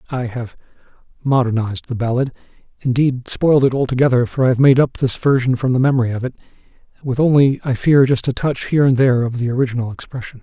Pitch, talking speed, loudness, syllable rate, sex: 130 Hz, 190 wpm, -17 LUFS, 6.6 syllables/s, male